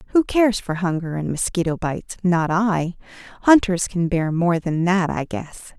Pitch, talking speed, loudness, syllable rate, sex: 180 Hz, 175 wpm, -20 LUFS, 4.8 syllables/s, female